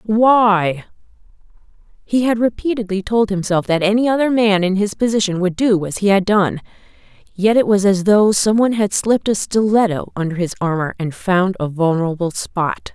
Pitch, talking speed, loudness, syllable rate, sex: 200 Hz, 175 wpm, -16 LUFS, 5.1 syllables/s, female